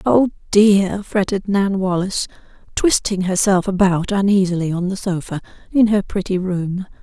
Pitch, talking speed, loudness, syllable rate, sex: 190 Hz, 135 wpm, -18 LUFS, 4.7 syllables/s, female